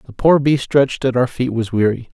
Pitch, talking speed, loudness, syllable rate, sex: 125 Hz, 245 wpm, -16 LUFS, 5.6 syllables/s, male